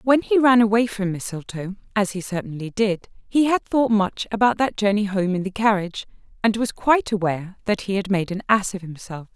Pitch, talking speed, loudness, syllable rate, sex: 205 Hz, 210 wpm, -21 LUFS, 5.5 syllables/s, female